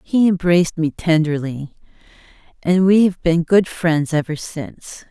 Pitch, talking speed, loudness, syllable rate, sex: 165 Hz, 140 wpm, -17 LUFS, 4.4 syllables/s, female